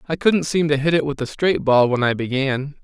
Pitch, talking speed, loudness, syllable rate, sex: 145 Hz, 275 wpm, -19 LUFS, 5.3 syllables/s, male